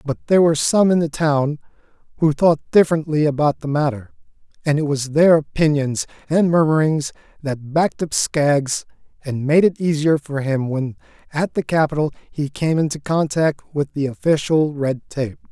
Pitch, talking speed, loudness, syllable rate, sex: 150 Hz, 165 wpm, -19 LUFS, 4.8 syllables/s, male